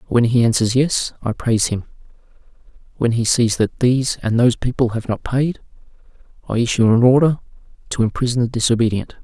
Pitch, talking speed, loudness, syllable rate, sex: 120 Hz, 170 wpm, -18 LUFS, 5.9 syllables/s, male